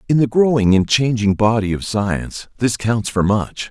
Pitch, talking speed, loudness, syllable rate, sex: 110 Hz, 195 wpm, -17 LUFS, 4.7 syllables/s, male